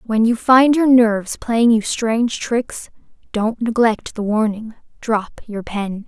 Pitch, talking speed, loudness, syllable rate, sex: 225 Hz, 150 wpm, -17 LUFS, 3.8 syllables/s, female